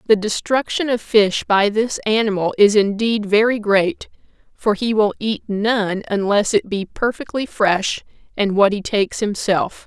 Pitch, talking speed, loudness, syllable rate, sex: 215 Hz, 160 wpm, -18 LUFS, 4.3 syllables/s, female